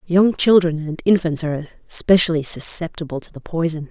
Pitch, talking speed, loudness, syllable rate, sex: 165 Hz, 155 wpm, -18 LUFS, 5.3 syllables/s, female